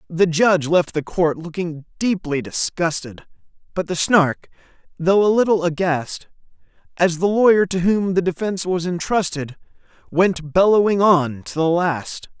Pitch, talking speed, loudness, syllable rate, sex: 175 Hz, 145 wpm, -19 LUFS, 4.4 syllables/s, male